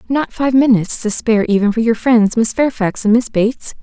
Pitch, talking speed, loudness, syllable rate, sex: 230 Hz, 220 wpm, -14 LUFS, 5.6 syllables/s, female